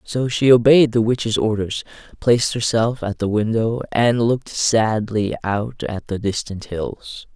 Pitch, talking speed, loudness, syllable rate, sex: 110 Hz, 155 wpm, -19 LUFS, 4.1 syllables/s, male